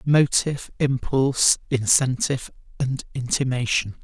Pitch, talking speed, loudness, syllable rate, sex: 135 Hz, 75 wpm, -22 LUFS, 4.5 syllables/s, male